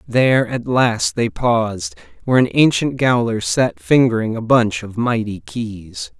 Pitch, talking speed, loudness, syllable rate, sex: 110 Hz, 155 wpm, -17 LUFS, 4.2 syllables/s, male